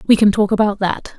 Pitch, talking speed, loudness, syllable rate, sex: 205 Hz, 255 wpm, -16 LUFS, 5.9 syllables/s, female